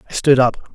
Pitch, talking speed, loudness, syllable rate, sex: 130 Hz, 240 wpm, -15 LUFS, 5.6 syllables/s, male